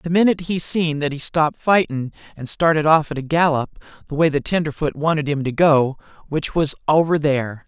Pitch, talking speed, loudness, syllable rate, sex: 155 Hz, 205 wpm, -19 LUFS, 5.4 syllables/s, male